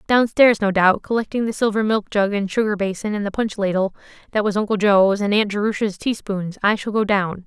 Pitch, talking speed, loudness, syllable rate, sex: 205 Hz, 215 wpm, -19 LUFS, 5.5 syllables/s, female